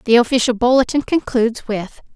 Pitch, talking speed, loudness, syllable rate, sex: 240 Hz, 140 wpm, -17 LUFS, 5.7 syllables/s, female